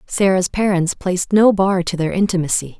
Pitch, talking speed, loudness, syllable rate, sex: 185 Hz, 170 wpm, -17 LUFS, 5.3 syllables/s, female